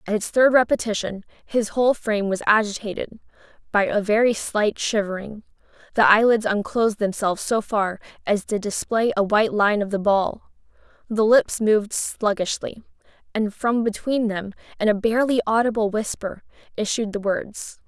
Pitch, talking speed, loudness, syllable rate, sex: 215 Hz, 150 wpm, -21 LUFS, 5.1 syllables/s, female